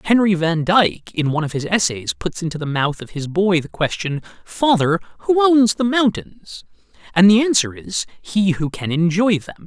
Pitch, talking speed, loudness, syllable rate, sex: 180 Hz, 195 wpm, -18 LUFS, 4.8 syllables/s, male